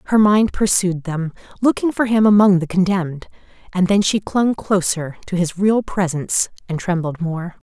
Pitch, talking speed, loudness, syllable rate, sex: 190 Hz, 170 wpm, -18 LUFS, 4.9 syllables/s, female